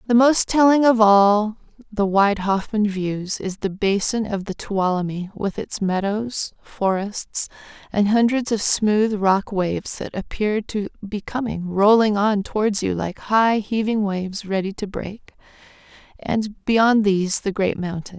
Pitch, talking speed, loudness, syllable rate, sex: 205 Hz, 155 wpm, -20 LUFS, 4.0 syllables/s, female